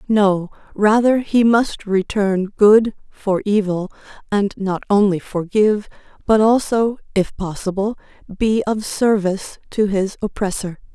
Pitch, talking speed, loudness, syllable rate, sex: 205 Hz, 120 wpm, -18 LUFS, 4.0 syllables/s, female